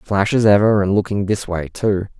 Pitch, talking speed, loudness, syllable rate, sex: 100 Hz, 220 wpm, -17 LUFS, 4.8 syllables/s, male